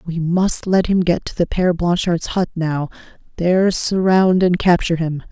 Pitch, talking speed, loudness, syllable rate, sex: 175 Hz, 180 wpm, -17 LUFS, 4.8 syllables/s, female